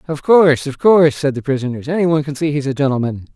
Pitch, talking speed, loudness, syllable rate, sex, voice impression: 145 Hz, 215 wpm, -15 LUFS, 7.0 syllables/s, male, very masculine, very adult-like, middle-aged, thick, slightly tensed, slightly powerful, slightly bright, slightly soft, slightly muffled, fluent, cool, very intellectual, refreshing, sincere, slightly calm, friendly, reassuring, slightly unique, slightly elegant, wild, slightly sweet, lively, kind, slightly modest